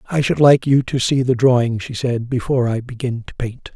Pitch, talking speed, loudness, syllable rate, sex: 125 Hz, 240 wpm, -18 LUFS, 5.3 syllables/s, male